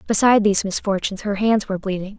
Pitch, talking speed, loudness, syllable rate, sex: 205 Hz, 190 wpm, -19 LUFS, 7.4 syllables/s, female